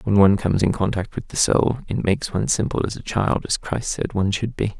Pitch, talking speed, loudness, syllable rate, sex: 105 Hz, 265 wpm, -21 LUFS, 6.1 syllables/s, male